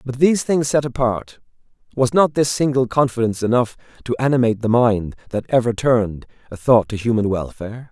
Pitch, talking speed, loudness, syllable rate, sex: 120 Hz, 175 wpm, -18 LUFS, 5.8 syllables/s, male